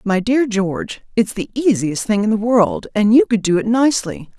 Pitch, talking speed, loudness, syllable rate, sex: 220 Hz, 220 wpm, -17 LUFS, 5.1 syllables/s, female